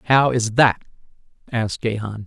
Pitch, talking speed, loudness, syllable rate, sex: 115 Hz, 130 wpm, -20 LUFS, 4.8 syllables/s, male